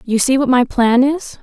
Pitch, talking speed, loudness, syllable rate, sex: 255 Hz, 250 wpm, -14 LUFS, 4.6 syllables/s, female